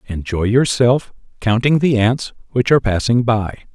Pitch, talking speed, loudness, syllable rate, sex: 120 Hz, 145 wpm, -16 LUFS, 4.7 syllables/s, male